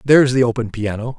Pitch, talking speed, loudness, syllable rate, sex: 120 Hz, 200 wpm, -17 LUFS, 6.4 syllables/s, male